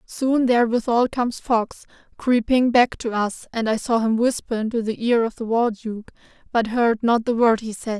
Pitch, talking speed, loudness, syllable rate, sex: 230 Hz, 205 wpm, -21 LUFS, 4.8 syllables/s, female